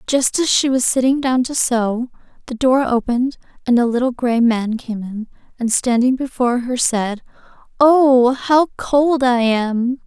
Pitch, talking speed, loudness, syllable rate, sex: 250 Hz, 165 wpm, -17 LUFS, 4.2 syllables/s, female